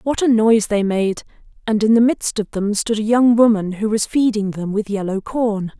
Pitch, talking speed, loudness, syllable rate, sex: 215 Hz, 230 wpm, -17 LUFS, 5.0 syllables/s, female